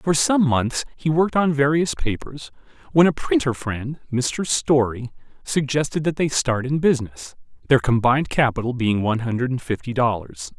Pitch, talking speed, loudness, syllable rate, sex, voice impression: 135 Hz, 165 wpm, -21 LUFS, 5.0 syllables/s, male, very masculine, very adult-like, slightly old, thick, slightly tensed, powerful, bright, soft, clear, fluent, cool, very intellectual, slightly refreshing, very sincere, calm, very friendly, very reassuring, unique, elegant, slightly wild, sweet, lively, very kind, slightly intense, slightly modest